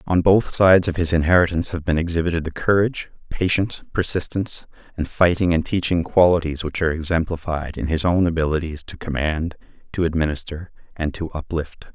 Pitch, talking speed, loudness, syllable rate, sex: 85 Hz, 160 wpm, -21 LUFS, 5.9 syllables/s, male